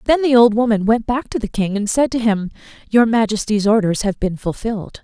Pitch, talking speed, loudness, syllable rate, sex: 220 Hz, 225 wpm, -17 LUFS, 5.6 syllables/s, female